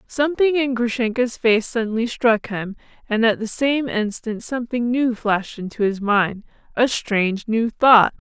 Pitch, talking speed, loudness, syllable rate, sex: 230 Hz, 160 wpm, -20 LUFS, 5.2 syllables/s, female